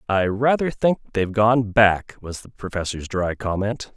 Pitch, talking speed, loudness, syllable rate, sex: 105 Hz, 165 wpm, -21 LUFS, 4.5 syllables/s, male